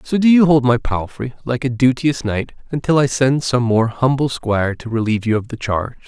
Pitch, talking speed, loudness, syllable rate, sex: 125 Hz, 225 wpm, -17 LUFS, 5.5 syllables/s, male